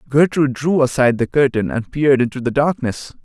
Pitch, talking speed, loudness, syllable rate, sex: 135 Hz, 185 wpm, -17 LUFS, 6.0 syllables/s, male